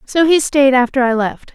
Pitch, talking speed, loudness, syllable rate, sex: 265 Hz, 235 wpm, -14 LUFS, 4.8 syllables/s, female